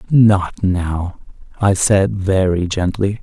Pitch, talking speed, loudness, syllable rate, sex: 95 Hz, 110 wpm, -16 LUFS, 3.0 syllables/s, male